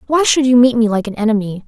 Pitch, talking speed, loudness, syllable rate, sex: 230 Hz, 285 wpm, -14 LUFS, 6.6 syllables/s, female